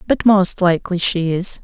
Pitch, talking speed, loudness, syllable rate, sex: 185 Hz, 185 wpm, -16 LUFS, 4.8 syllables/s, female